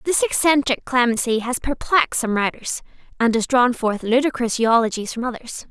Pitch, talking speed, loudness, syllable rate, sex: 245 Hz, 160 wpm, -20 LUFS, 5.2 syllables/s, female